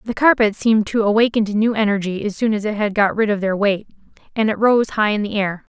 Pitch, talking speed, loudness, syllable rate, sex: 210 Hz, 260 wpm, -18 LUFS, 6.2 syllables/s, female